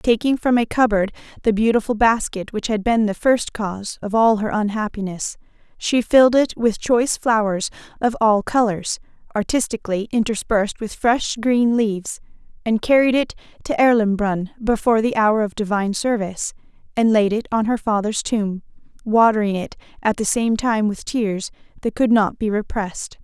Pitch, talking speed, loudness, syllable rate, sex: 220 Hz, 165 wpm, -19 LUFS, 5.1 syllables/s, female